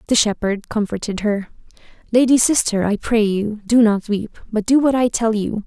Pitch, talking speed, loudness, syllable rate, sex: 220 Hz, 190 wpm, -18 LUFS, 4.8 syllables/s, female